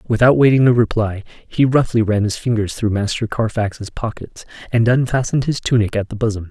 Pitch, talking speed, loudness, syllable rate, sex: 115 Hz, 185 wpm, -17 LUFS, 5.5 syllables/s, male